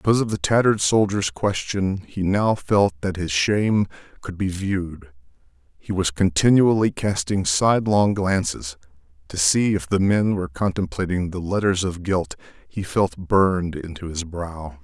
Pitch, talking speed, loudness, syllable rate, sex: 90 Hz, 155 wpm, -21 LUFS, 4.7 syllables/s, male